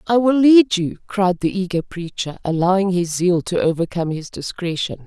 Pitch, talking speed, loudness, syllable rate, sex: 185 Hz, 180 wpm, -19 LUFS, 5.0 syllables/s, female